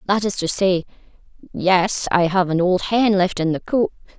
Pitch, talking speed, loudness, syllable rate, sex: 185 Hz, 170 wpm, -19 LUFS, 4.6 syllables/s, female